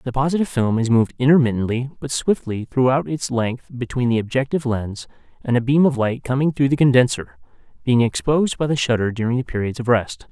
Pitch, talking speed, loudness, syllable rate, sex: 125 Hz, 200 wpm, -20 LUFS, 6.0 syllables/s, male